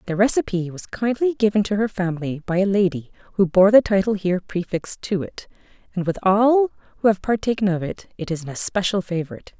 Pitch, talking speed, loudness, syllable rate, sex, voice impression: 195 Hz, 200 wpm, -21 LUFS, 6.1 syllables/s, female, very feminine, adult-like, slightly middle-aged, very thin, slightly relaxed, slightly weak, slightly dark, hard, clear, fluent, slightly raspy, slightly cute, slightly cool, intellectual, very refreshing, slightly sincere, calm, friendly, reassuring, very unique, elegant, sweet, slightly lively, kind